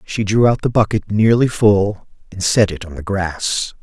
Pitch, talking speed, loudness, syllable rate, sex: 105 Hz, 205 wpm, -16 LUFS, 4.4 syllables/s, male